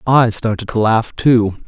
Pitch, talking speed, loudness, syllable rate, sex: 115 Hz, 180 wpm, -15 LUFS, 4.1 syllables/s, male